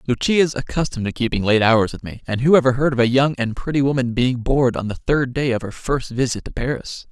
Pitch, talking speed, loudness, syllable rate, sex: 125 Hz, 255 wpm, -19 LUFS, 6.4 syllables/s, male